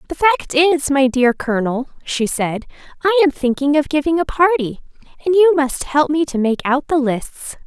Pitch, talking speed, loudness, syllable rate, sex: 285 Hz, 195 wpm, -17 LUFS, 4.8 syllables/s, female